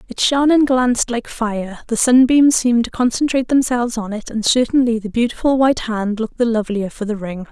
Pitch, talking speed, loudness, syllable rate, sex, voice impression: 235 Hz, 210 wpm, -17 LUFS, 5.9 syllables/s, female, feminine, adult-like, slightly relaxed, powerful, slightly hard, raspy, intellectual, calm, lively, sharp